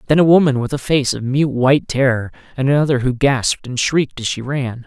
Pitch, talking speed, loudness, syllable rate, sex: 135 Hz, 235 wpm, -16 LUFS, 5.9 syllables/s, male